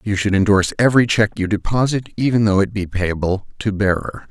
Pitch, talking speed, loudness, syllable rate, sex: 105 Hz, 195 wpm, -18 LUFS, 5.9 syllables/s, male